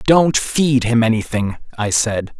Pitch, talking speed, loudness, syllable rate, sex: 120 Hz, 150 wpm, -17 LUFS, 3.9 syllables/s, male